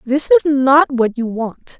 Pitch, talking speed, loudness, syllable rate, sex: 250 Hz, 200 wpm, -14 LUFS, 3.9 syllables/s, female